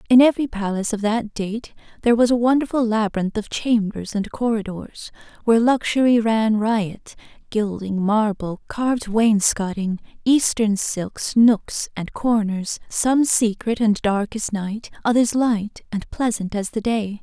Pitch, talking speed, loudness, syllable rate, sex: 220 Hz, 145 wpm, -20 LUFS, 4.3 syllables/s, female